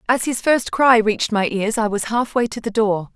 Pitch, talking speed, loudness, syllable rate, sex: 225 Hz, 245 wpm, -18 LUFS, 5.0 syllables/s, female